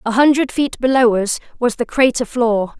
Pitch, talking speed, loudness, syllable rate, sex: 240 Hz, 195 wpm, -16 LUFS, 4.8 syllables/s, female